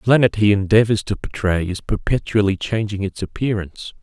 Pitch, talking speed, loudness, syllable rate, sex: 105 Hz, 165 wpm, -19 LUFS, 5.6 syllables/s, male